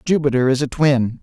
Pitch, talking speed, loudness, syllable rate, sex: 135 Hz, 195 wpm, -17 LUFS, 5.3 syllables/s, male